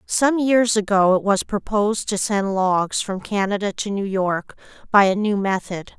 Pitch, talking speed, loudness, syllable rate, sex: 200 Hz, 180 wpm, -20 LUFS, 4.4 syllables/s, female